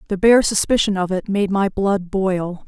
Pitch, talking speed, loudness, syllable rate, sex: 195 Hz, 200 wpm, -18 LUFS, 4.5 syllables/s, female